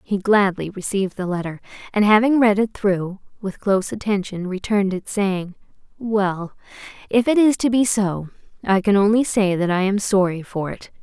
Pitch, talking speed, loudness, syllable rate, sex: 200 Hz, 180 wpm, -20 LUFS, 5.0 syllables/s, female